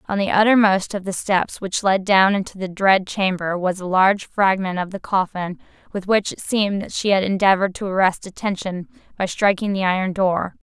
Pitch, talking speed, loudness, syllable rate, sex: 190 Hz, 205 wpm, -19 LUFS, 5.3 syllables/s, female